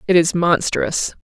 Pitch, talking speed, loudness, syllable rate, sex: 175 Hz, 145 wpm, -17 LUFS, 3.9 syllables/s, female